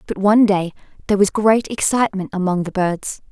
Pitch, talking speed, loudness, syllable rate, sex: 200 Hz, 180 wpm, -18 LUFS, 5.9 syllables/s, female